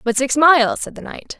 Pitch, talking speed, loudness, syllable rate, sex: 265 Hz, 260 wpm, -15 LUFS, 4.7 syllables/s, female